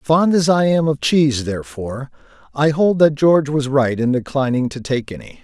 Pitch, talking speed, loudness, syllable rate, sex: 140 Hz, 200 wpm, -17 LUFS, 5.3 syllables/s, male